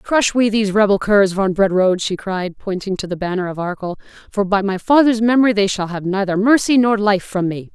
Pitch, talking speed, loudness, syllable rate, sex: 200 Hz, 225 wpm, -17 LUFS, 5.7 syllables/s, female